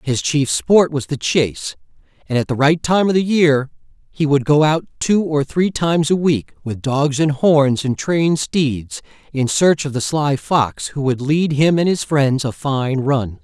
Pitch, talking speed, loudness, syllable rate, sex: 145 Hz, 210 wpm, -17 LUFS, 4.2 syllables/s, male